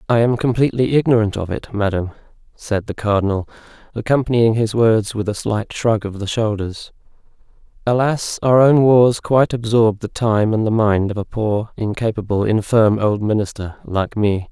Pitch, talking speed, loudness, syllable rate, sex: 110 Hz, 165 wpm, -17 LUFS, 5.0 syllables/s, male